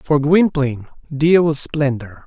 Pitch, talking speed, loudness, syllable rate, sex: 145 Hz, 130 wpm, -16 LUFS, 4.0 syllables/s, male